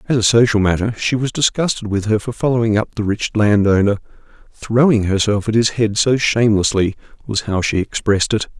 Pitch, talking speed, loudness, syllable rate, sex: 110 Hz, 180 wpm, -16 LUFS, 5.6 syllables/s, male